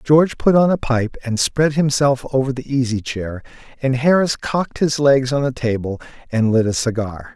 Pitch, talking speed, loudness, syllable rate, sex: 130 Hz, 195 wpm, -18 LUFS, 5.0 syllables/s, male